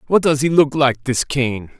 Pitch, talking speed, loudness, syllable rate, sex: 135 Hz, 235 wpm, -17 LUFS, 4.4 syllables/s, male